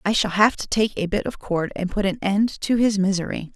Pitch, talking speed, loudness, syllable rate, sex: 200 Hz, 270 wpm, -22 LUFS, 5.3 syllables/s, female